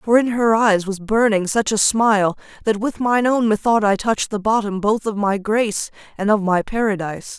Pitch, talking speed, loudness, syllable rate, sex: 215 Hz, 210 wpm, -18 LUFS, 5.2 syllables/s, female